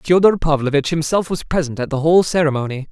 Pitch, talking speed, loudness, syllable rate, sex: 155 Hz, 185 wpm, -17 LUFS, 6.3 syllables/s, male